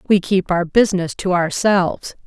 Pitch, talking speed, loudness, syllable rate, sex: 180 Hz, 160 wpm, -17 LUFS, 5.0 syllables/s, female